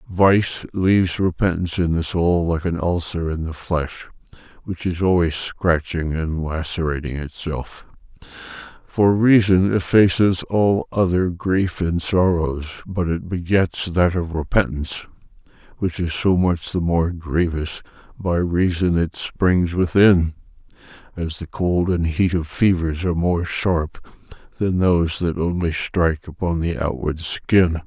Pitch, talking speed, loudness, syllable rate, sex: 85 Hz, 140 wpm, -20 LUFS, 4.1 syllables/s, male